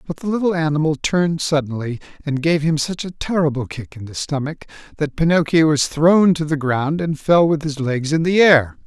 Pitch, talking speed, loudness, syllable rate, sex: 155 Hz, 210 wpm, -18 LUFS, 5.2 syllables/s, male